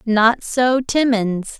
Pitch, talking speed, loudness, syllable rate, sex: 235 Hz, 115 wpm, -17 LUFS, 2.7 syllables/s, female